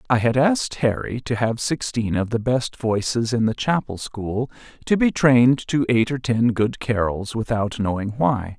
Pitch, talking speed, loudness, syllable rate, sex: 120 Hz, 190 wpm, -21 LUFS, 4.5 syllables/s, male